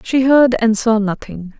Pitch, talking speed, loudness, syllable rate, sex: 230 Hz, 190 wpm, -14 LUFS, 4.1 syllables/s, female